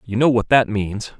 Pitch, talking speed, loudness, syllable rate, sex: 115 Hz, 250 wpm, -18 LUFS, 4.7 syllables/s, male